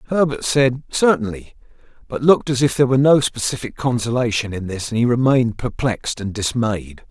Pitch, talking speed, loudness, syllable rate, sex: 120 Hz, 160 wpm, -18 LUFS, 5.6 syllables/s, male